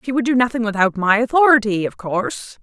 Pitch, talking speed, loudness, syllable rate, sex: 225 Hz, 205 wpm, -17 LUFS, 6.0 syllables/s, female